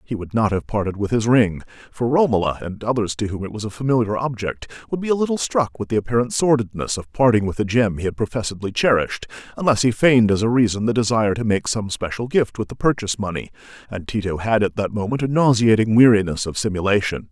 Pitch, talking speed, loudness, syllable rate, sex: 110 Hz, 225 wpm, -20 LUFS, 6.3 syllables/s, male